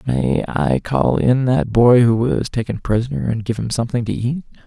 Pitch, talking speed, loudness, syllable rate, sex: 115 Hz, 205 wpm, -18 LUFS, 4.9 syllables/s, male